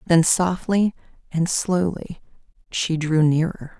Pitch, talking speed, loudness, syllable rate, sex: 170 Hz, 110 wpm, -21 LUFS, 3.5 syllables/s, female